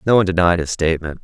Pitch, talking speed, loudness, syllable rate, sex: 85 Hz, 245 wpm, -17 LUFS, 8.1 syllables/s, male